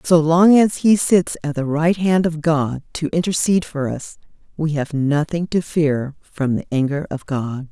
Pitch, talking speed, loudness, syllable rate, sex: 155 Hz, 195 wpm, -18 LUFS, 4.4 syllables/s, female